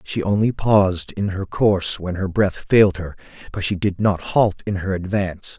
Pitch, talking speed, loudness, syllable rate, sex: 95 Hz, 205 wpm, -20 LUFS, 4.9 syllables/s, male